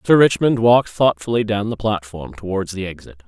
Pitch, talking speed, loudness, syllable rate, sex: 105 Hz, 185 wpm, -18 LUFS, 5.6 syllables/s, male